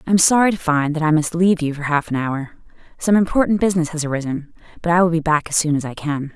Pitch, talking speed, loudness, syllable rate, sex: 160 Hz, 275 wpm, -18 LUFS, 6.7 syllables/s, female